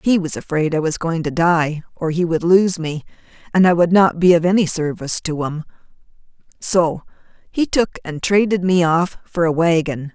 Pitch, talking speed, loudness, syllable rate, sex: 170 Hz, 195 wpm, -17 LUFS, 4.9 syllables/s, female